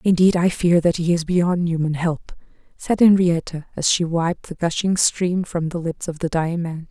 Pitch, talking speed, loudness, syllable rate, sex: 170 Hz, 210 wpm, -20 LUFS, 4.8 syllables/s, female